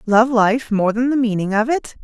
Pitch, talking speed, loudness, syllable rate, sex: 230 Hz, 235 wpm, -17 LUFS, 4.9 syllables/s, female